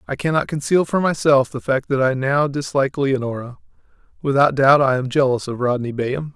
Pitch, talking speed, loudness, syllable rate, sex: 135 Hz, 190 wpm, -19 LUFS, 5.6 syllables/s, male